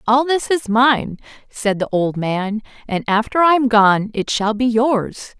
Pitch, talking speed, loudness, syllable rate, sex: 230 Hz, 190 wpm, -17 LUFS, 3.9 syllables/s, female